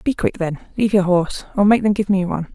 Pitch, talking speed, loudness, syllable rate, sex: 195 Hz, 285 wpm, -18 LUFS, 6.7 syllables/s, female